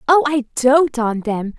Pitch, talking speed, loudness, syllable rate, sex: 265 Hz, 190 wpm, -17 LUFS, 4.0 syllables/s, female